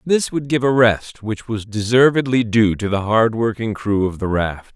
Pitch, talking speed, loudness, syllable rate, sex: 110 Hz, 200 wpm, -18 LUFS, 4.5 syllables/s, male